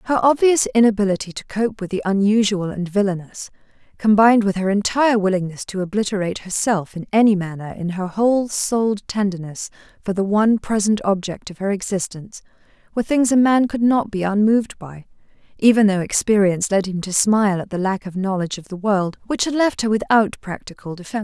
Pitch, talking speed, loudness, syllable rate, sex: 205 Hz, 185 wpm, -19 LUFS, 5.8 syllables/s, female